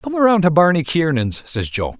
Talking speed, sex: 210 wpm, male